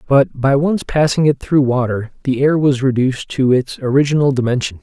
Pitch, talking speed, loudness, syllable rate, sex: 135 Hz, 185 wpm, -16 LUFS, 5.3 syllables/s, male